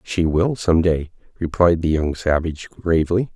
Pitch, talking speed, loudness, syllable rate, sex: 85 Hz, 160 wpm, -20 LUFS, 4.7 syllables/s, male